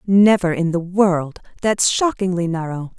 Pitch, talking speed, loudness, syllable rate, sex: 180 Hz, 140 wpm, -18 LUFS, 4.2 syllables/s, female